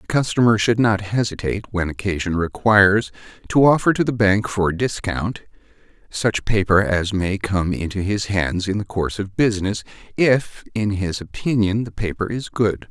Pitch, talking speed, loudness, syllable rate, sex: 100 Hz, 165 wpm, -20 LUFS, 4.8 syllables/s, male